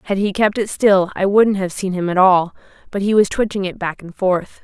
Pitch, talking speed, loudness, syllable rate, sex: 195 Hz, 260 wpm, -17 LUFS, 5.2 syllables/s, female